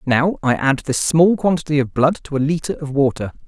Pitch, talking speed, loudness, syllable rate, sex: 145 Hz, 225 wpm, -18 LUFS, 5.4 syllables/s, male